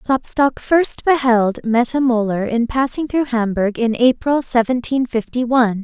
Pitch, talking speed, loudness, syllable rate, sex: 245 Hz, 145 wpm, -17 LUFS, 4.4 syllables/s, female